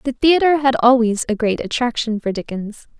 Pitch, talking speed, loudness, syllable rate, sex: 240 Hz, 180 wpm, -17 LUFS, 5.1 syllables/s, female